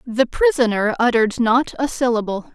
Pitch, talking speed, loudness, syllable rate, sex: 245 Hz, 140 wpm, -18 LUFS, 5.1 syllables/s, female